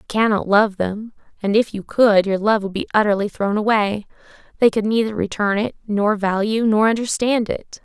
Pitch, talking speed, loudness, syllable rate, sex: 210 Hz, 190 wpm, -19 LUFS, 5.2 syllables/s, female